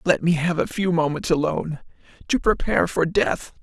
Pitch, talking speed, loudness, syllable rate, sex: 165 Hz, 180 wpm, -22 LUFS, 5.3 syllables/s, male